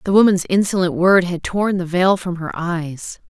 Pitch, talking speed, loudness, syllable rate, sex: 180 Hz, 200 wpm, -17 LUFS, 4.6 syllables/s, female